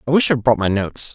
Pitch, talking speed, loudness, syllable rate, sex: 125 Hz, 315 wpm, -17 LUFS, 7.1 syllables/s, male